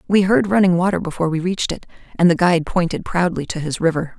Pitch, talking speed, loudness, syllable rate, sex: 175 Hz, 230 wpm, -18 LUFS, 6.7 syllables/s, female